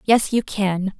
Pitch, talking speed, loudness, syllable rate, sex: 205 Hz, 180 wpm, -20 LUFS, 3.4 syllables/s, female